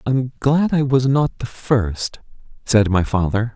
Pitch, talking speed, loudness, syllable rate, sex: 120 Hz, 170 wpm, -18 LUFS, 3.8 syllables/s, male